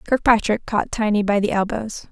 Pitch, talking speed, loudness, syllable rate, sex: 215 Hz, 170 wpm, -20 LUFS, 5.0 syllables/s, female